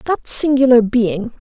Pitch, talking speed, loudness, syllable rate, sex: 240 Hz, 125 wpm, -14 LUFS, 4.1 syllables/s, female